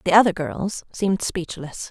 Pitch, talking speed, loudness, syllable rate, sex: 185 Hz, 160 wpm, -23 LUFS, 4.6 syllables/s, female